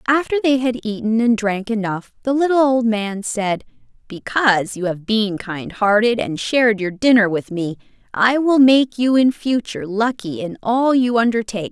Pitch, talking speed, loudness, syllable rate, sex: 225 Hz, 180 wpm, -18 LUFS, 4.7 syllables/s, female